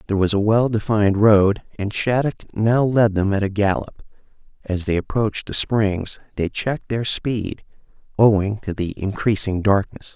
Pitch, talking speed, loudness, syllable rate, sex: 105 Hz, 165 wpm, -20 LUFS, 4.7 syllables/s, male